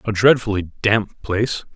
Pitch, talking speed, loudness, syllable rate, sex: 105 Hz, 135 wpm, -19 LUFS, 5.0 syllables/s, male